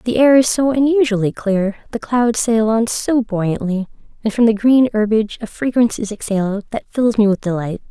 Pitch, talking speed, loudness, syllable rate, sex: 220 Hz, 195 wpm, -16 LUFS, 5.3 syllables/s, female